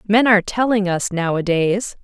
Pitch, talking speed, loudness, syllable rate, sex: 200 Hz, 145 wpm, -17 LUFS, 4.9 syllables/s, female